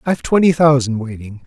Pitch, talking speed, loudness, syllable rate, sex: 135 Hz, 165 wpm, -15 LUFS, 6.0 syllables/s, male